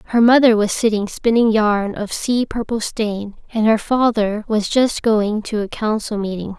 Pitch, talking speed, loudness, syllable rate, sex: 220 Hz, 180 wpm, -18 LUFS, 4.4 syllables/s, female